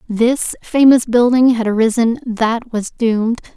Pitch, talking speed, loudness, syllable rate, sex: 235 Hz, 135 wpm, -15 LUFS, 4.1 syllables/s, female